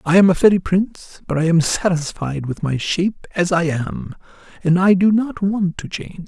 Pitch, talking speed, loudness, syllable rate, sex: 180 Hz, 210 wpm, -18 LUFS, 5.1 syllables/s, male